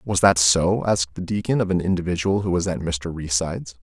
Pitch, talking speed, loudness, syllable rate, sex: 90 Hz, 215 wpm, -21 LUFS, 5.6 syllables/s, male